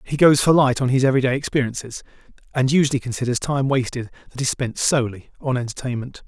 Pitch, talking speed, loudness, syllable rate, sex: 130 Hz, 180 wpm, -20 LUFS, 6.6 syllables/s, male